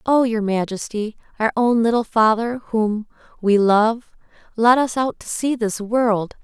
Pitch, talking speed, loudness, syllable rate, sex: 225 Hz, 160 wpm, -19 LUFS, 4.0 syllables/s, female